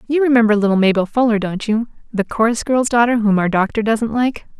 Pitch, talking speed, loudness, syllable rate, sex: 225 Hz, 195 wpm, -16 LUFS, 6.1 syllables/s, female